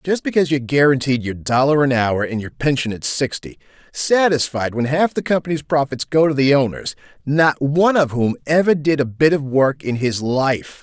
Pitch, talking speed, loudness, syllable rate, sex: 140 Hz, 200 wpm, -18 LUFS, 5.2 syllables/s, male